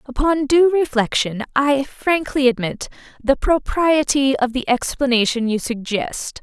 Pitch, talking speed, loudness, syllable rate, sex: 265 Hz, 120 wpm, -18 LUFS, 4.1 syllables/s, female